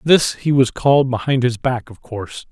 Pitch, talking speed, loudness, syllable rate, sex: 125 Hz, 215 wpm, -17 LUFS, 5.0 syllables/s, male